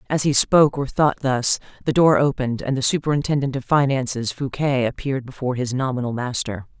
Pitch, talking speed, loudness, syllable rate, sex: 130 Hz, 175 wpm, -20 LUFS, 6.0 syllables/s, female